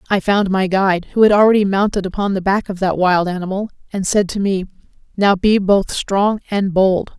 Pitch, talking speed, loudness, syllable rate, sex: 195 Hz, 210 wpm, -16 LUFS, 5.3 syllables/s, female